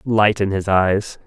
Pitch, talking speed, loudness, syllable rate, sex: 100 Hz, 190 wpm, -18 LUFS, 3.6 syllables/s, male